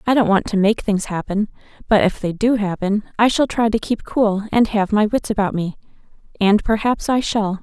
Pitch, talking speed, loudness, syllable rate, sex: 210 Hz, 220 wpm, -18 LUFS, 5.1 syllables/s, female